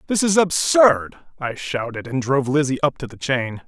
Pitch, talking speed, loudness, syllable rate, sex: 140 Hz, 195 wpm, -20 LUFS, 5.0 syllables/s, male